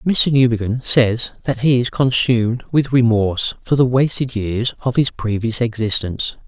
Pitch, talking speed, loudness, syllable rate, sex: 120 Hz, 160 wpm, -17 LUFS, 4.7 syllables/s, male